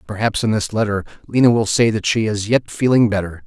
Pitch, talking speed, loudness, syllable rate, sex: 105 Hz, 225 wpm, -17 LUFS, 5.8 syllables/s, male